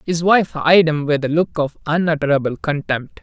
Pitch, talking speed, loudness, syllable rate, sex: 155 Hz, 185 wpm, -17 LUFS, 5.0 syllables/s, male